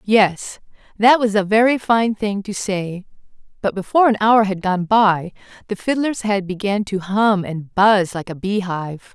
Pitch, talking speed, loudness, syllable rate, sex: 205 Hz, 175 wpm, -18 LUFS, 4.4 syllables/s, female